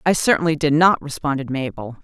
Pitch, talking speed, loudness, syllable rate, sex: 145 Hz, 175 wpm, -19 LUFS, 5.8 syllables/s, female